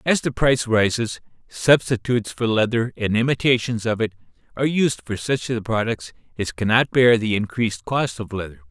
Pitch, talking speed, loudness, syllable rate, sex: 115 Hz, 180 wpm, -21 LUFS, 5.4 syllables/s, male